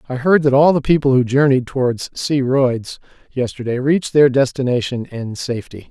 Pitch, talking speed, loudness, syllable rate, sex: 130 Hz, 175 wpm, -17 LUFS, 5.2 syllables/s, male